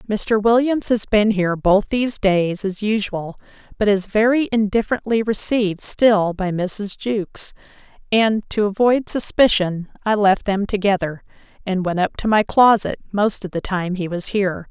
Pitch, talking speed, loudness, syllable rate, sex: 205 Hz, 165 wpm, -19 LUFS, 4.6 syllables/s, female